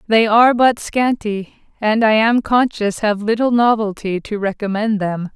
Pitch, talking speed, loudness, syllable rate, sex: 215 Hz, 155 wpm, -16 LUFS, 4.4 syllables/s, female